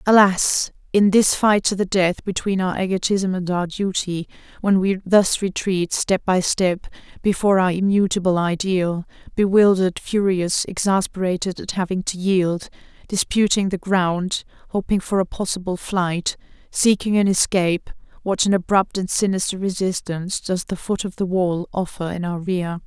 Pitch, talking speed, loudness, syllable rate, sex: 185 Hz, 150 wpm, -20 LUFS, 4.7 syllables/s, female